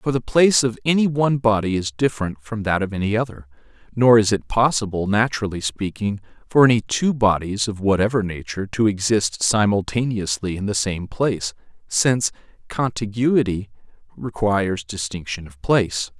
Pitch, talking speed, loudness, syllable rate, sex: 105 Hz, 150 wpm, -20 LUFS, 5.3 syllables/s, male